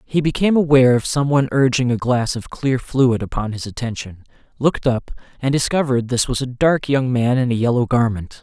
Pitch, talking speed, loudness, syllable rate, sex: 125 Hz, 200 wpm, -18 LUFS, 5.7 syllables/s, male